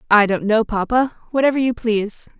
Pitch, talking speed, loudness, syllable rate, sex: 225 Hz, 175 wpm, -18 LUFS, 5.6 syllables/s, female